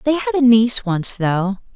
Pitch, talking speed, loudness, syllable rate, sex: 235 Hz, 205 wpm, -16 LUFS, 5.2 syllables/s, female